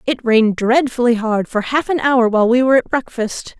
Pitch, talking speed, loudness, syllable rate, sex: 240 Hz, 215 wpm, -16 LUFS, 5.5 syllables/s, female